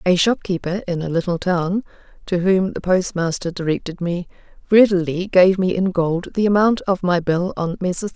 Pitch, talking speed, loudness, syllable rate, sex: 180 Hz, 185 wpm, -19 LUFS, 4.8 syllables/s, female